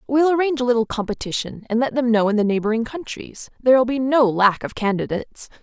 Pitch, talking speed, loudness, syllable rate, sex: 235 Hz, 205 wpm, -20 LUFS, 6.1 syllables/s, female